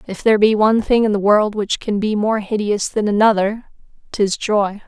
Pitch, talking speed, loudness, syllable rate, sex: 210 Hz, 210 wpm, -17 LUFS, 5.1 syllables/s, female